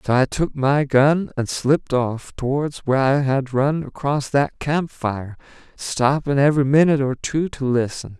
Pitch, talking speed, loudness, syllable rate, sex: 135 Hz, 175 wpm, -20 LUFS, 4.5 syllables/s, male